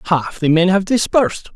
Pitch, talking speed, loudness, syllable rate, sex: 185 Hz, 195 wpm, -16 LUFS, 5.4 syllables/s, male